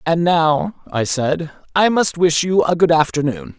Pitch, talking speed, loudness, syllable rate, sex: 155 Hz, 185 wpm, -17 LUFS, 4.2 syllables/s, male